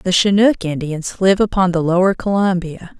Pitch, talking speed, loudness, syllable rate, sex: 185 Hz, 160 wpm, -16 LUFS, 4.8 syllables/s, female